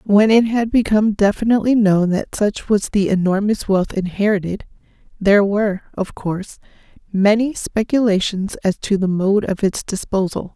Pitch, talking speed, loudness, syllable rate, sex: 205 Hz, 150 wpm, -17 LUFS, 5.0 syllables/s, female